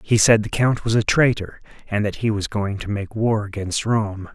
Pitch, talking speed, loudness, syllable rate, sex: 105 Hz, 235 wpm, -20 LUFS, 4.8 syllables/s, male